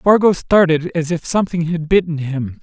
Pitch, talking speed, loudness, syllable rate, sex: 165 Hz, 185 wpm, -16 LUFS, 5.0 syllables/s, male